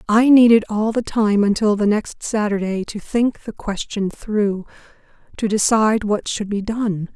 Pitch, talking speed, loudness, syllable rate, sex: 210 Hz, 170 wpm, -18 LUFS, 4.4 syllables/s, female